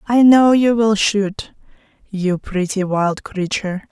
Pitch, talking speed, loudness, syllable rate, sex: 205 Hz, 140 wpm, -16 LUFS, 3.8 syllables/s, female